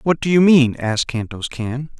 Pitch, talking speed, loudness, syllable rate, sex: 135 Hz, 210 wpm, -17 LUFS, 4.9 syllables/s, male